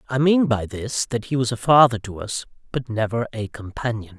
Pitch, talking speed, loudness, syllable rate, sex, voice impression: 120 Hz, 215 wpm, -22 LUFS, 5.2 syllables/s, male, masculine, adult-like, tensed, clear, fluent, intellectual, friendly, unique, lively, slightly sharp, slightly light